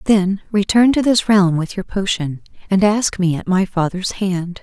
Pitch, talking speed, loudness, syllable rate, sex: 190 Hz, 195 wpm, -17 LUFS, 4.4 syllables/s, female